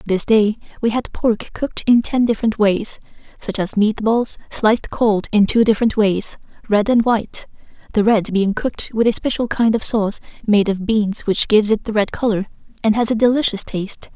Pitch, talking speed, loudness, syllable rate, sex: 215 Hz, 200 wpm, -18 LUFS, 5.2 syllables/s, female